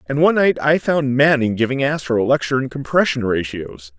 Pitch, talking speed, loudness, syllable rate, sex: 130 Hz, 195 wpm, -17 LUFS, 5.8 syllables/s, male